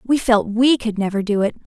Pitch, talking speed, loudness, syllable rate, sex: 225 Hz, 240 wpm, -18 LUFS, 5.4 syllables/s, female